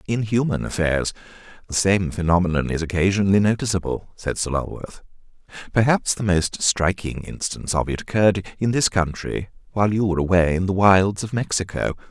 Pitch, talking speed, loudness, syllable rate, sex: 95 Hz, 160 wpm, -21 LUFS, 5.6 syllables/s, male